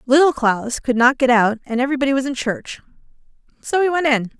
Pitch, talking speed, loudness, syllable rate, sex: 260 Hz, 205 wpm, -18 LUFS, 6.0 syllables/s, female